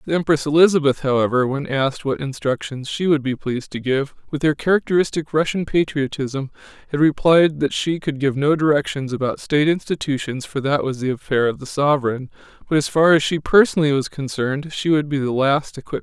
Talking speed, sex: 200 wpm, male